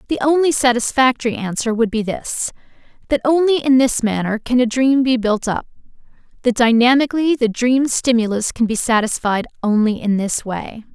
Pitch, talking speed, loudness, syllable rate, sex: 240 Hz, 165 wpm, -17 LUFS, 5.2 syllables/s, female